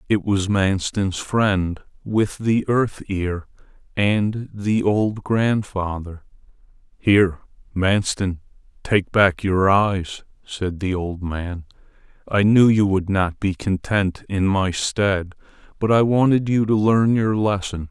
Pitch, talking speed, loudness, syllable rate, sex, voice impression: 100 Hz, 135 wpm, -20 LUFS, 3.4 syllables/s, male, very masculine, slightly old, very thick, relaxed, very powerful, dark, slightly hard, muffled, slightly halting, raspy, very cool, intellectual, slightly sincere, very calm, very mature, very friendly, reassuring, very unique, elegant, very wild, very sweet, slightly lively, very kind, modest